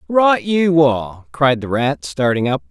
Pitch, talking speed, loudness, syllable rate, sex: 140 Hz, 180 wpm, -16 LUFS, 4.1 syllables/s, male